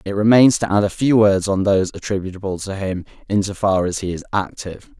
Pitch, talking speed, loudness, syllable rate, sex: 100 Hz, 230 wpm, -18 LUFS, 6.0 syllables/s, male